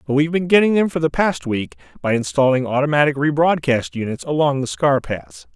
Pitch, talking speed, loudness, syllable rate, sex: 140 Hz, 205 wpm, -18 LUFS, 5.7 syllables/s, male